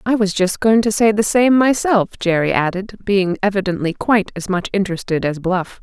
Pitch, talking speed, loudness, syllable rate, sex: 200 Hz, 195 wpm, -17 LUFS, 5.2 syllables/s, female